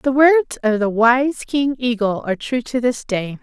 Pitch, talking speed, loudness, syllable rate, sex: 245 Hz, 210 wpm, -18 LUFS, 4.2 syllables/s, female